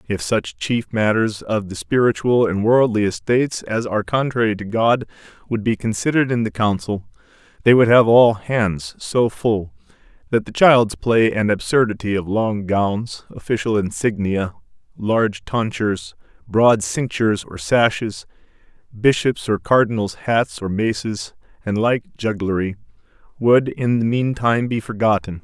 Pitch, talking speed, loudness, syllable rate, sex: 110 Hz, 145 wpm, -19 LUFS, 4.3 syllables/s, male